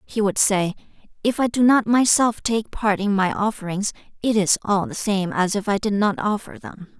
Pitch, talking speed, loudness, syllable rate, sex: 210 Hz, 215 wpm, -21 LUFS, 4.9 syllables/s, female